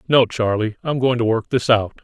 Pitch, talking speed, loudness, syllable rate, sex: 120 Hz, 235 wpm, -19 LUFS, 5.3 syllables/s, male